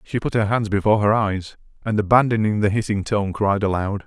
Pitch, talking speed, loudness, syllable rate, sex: 105 Hz, 205 wpm, -20 LUFS, 5.6 syllables/s, male